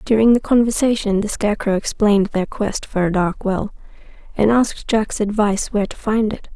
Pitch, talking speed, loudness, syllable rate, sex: 210 Hz, 185 wpm, -18 LUFS, 5.5 syllables/s, female